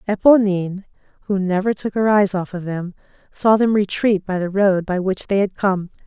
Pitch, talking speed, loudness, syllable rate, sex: 195 Hz, 200 wpm, -19 LUFS, 5.0 syllables/s, female